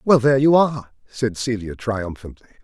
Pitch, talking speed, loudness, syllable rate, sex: 125 Hz, 160 wpm, -19 LUFS, 5.4 syllables/s, male